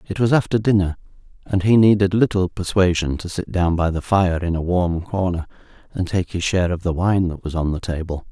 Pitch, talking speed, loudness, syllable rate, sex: 90 Hz, 225 wpm, -20 LUFS, 5.6 syllables/s, male